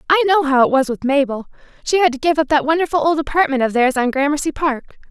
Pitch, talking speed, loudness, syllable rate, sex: 290 Hz, 245 wpm, -16 LUFS, 6.5 syllables/s, female